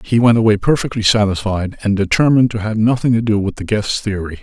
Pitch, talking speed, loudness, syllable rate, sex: 110 Hz, 215 wpm, -15 LUFS, 6.1 syllables/s, male